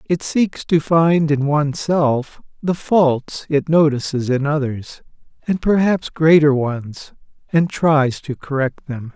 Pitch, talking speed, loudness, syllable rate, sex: 150 Hz, 140 wpm, -17 LUFS, 3.6 syllables/s, male